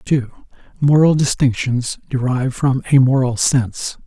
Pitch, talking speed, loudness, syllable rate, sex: 130 Hz, 120 wpm, -17 LUFS, 4.6 syllables/s, male